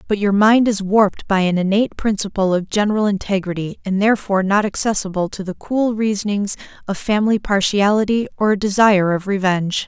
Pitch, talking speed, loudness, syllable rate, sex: 200 Hz, 170 wpm, -18 LUFS, 5.9 syllables/s, female